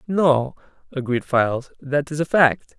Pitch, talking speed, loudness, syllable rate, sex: 140 Hz, 150 wpm, -20 LUFS, 4.2 syllables/s, male